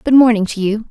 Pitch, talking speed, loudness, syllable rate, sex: 220 Hz, 265 wpm, -14 LUFS, 6.2 syllables/s, female